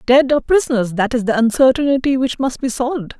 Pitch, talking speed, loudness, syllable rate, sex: 255 Hz, 205 wpm, -16 LUFS, 5.6 syllables/s, female